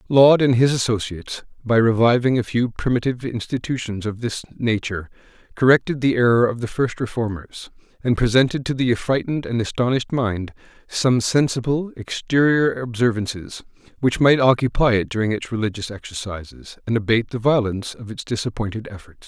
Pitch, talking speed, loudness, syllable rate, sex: 120 Hz, 150 wpm, -20 LUFS, 5.6 syllables/s, male